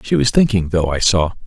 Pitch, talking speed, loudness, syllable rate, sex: 90 Hz, 245 wpm, -16 LUFS, 5.4 syllables/s, male